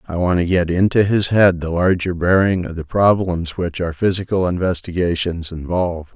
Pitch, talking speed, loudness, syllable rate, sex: 90 Hz, 175 wpm, -18 LUFS, 5.0 syllables/s, male